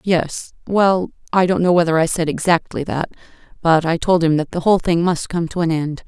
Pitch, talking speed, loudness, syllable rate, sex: 170 Hz, 215 wpm, -18 LUFS, 5.2 syllables/s, female